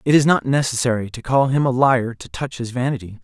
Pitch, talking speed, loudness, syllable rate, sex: 130 Hz, 240 wpm, -19 LUFS, 5.8 syllables/s, male